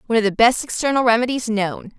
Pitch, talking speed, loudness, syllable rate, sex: 230 Hz, 210 wpm, -18 LUFS, 6.3 syllables/s, female